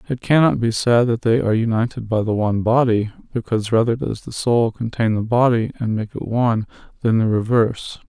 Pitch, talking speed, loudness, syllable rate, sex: 115 Hz, 200 wpm, -19 LUFS, 5.7 syllables/s, male